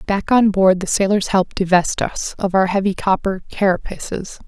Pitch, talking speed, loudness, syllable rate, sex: 190 Hz, 175 wpm, -18 LUFS, 5.0 syllables/s, female